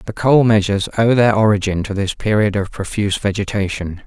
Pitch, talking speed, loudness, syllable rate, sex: 105 Hz, 175 wpm, -17 LUFS, 5.8 syllables/s, male